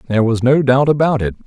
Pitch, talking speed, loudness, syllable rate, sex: 130 Hz, 245 wpm, -14 LUFS, 6.7 syllables/s, male